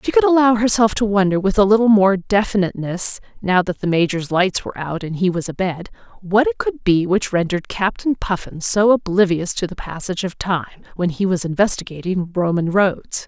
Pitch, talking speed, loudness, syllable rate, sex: 195 Hz, 195 wpm, -18 LUFS, 5.5 syllables/s, female